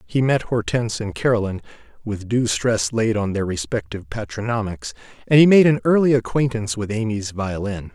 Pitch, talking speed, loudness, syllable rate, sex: 110 Hz, 150 wpm, -20 LUFS, 5.4 syllables/s, male